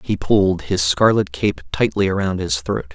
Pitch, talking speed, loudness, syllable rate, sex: 90 Hz, 185 wpm, -18 LUFS, 4.9 syllables/s, male